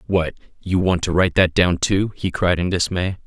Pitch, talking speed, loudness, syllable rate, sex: 90 Hz, 220 wpm, -19 LUFS, 5.1 syllables/s, male